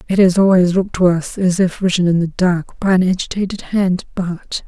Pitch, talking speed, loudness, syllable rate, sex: 185 Hz, 220 wpm, -16 LUFS, 5.3 syllables/s, female